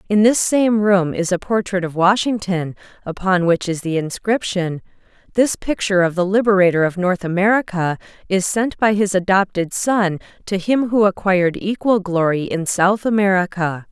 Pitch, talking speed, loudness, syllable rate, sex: 190 Hz, 160 wpm, -18 LUFS, 4.9 syllables/s, female